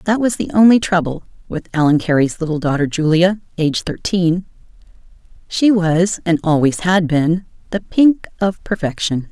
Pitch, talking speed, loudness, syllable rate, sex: 175 Hz, 150 wpm, -16 LUFS, 4.9 syllables/s, female